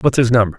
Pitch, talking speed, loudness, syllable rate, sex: 115 Hz, 305 wpm, -14 LUFS, 7.3 syllables/s, male